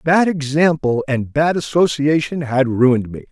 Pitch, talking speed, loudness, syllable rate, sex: 145 Hz, 145 wpm, -17 LUFS, 4.4 syllables/s, male